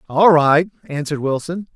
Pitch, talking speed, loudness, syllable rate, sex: 160 Hz, 135 wpm, -17 LUFS, 5.2 syllables/s, male